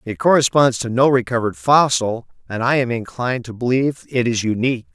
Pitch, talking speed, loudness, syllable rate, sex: 125 Hz, 180 wpm, -18 LUFS, 6.0 syllables/s, male